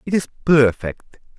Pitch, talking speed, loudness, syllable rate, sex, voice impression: 145 Hz, 130 wpm, -17 LUFS, 4.2 syllables/s, male, masculine, adult-like, relaxed, powerful, soft, slightly clear, slightly refreshing, calm, friendly, reassuring, lively, kind